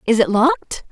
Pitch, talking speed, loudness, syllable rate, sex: 245 Hz, 200 wpm, -17 LUFS, 5.4 syllables/s, female